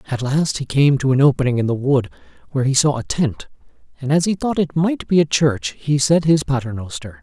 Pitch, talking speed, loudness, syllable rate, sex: 140 Hz, 260 wpm, -18 LUFS, 5.9 syllables/s, male